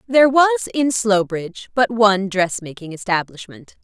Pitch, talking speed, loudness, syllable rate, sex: 210 Hz, 125 wpm, -18 LUFS, 4.8 syllables/s, female